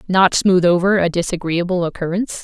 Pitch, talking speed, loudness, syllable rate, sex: 180 Hz, 150 wpm, -17 LUFS, 5.7 syllables/s, female